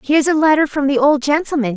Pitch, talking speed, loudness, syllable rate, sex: 290 Hz, 240 wpm, -15 LUFS, 6.5 syllables/s, female